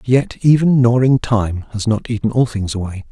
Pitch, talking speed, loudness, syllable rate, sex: 115 Hz, 210 wpm, -16 LUFS, 5.2 syllables/s, male